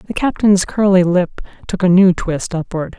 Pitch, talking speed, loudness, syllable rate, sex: 185 Hz, 180 wpm, -15 LUFS, 4.5 syllables/s, female